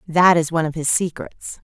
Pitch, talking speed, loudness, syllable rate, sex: 165 Hz, 210 wpm, -18 LUFS, 5.4 syllables/s, female